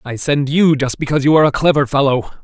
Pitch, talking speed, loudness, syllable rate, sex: 140 Hz, 245 wpm, -14 LUFS, 6.7 syllables/s, male